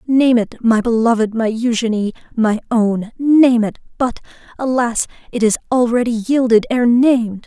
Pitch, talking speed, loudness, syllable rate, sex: 235 Hz, 130 wpm, -16 LUFS, 4.8 syllables/s, female